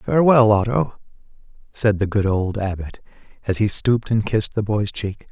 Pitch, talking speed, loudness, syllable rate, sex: 105 Hz, 170 wpm, -20 LUFS, 5.1 syllables/s, male